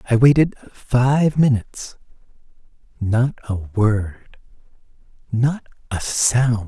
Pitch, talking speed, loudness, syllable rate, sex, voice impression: 120 Hz, 80 wpm, -19 LUFS, 3.3 syllables/s, male, slightly middle-aged, slightly old, relaxed, slightly weak, muffled, halting, slightly calm, mature, friendly, slightly reassuring, kind, slightly modest